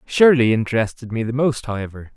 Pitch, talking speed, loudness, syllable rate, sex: 120 Hz, 165 wpm, -19 LUFS, 5.9 syllables/s, male